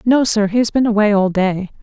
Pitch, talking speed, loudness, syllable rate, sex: 210 Hz, 265 wpm, -15 LUFS, 5.6 syllables/s, female